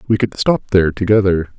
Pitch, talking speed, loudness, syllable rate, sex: 100 Hz, 190 wpm, -15 LUFS, 6.1 syllables/s, male